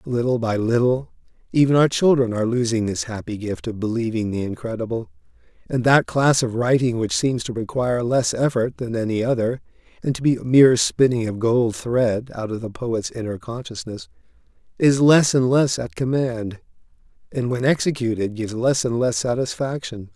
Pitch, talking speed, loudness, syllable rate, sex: 120 Hz, 175 wpm, -21 LUFS, 5.2 syllables/s, male